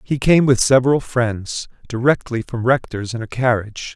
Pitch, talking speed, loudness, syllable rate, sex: 120 Hz, 165 wpm, -18 LUFS, 4.9 syllables/s, male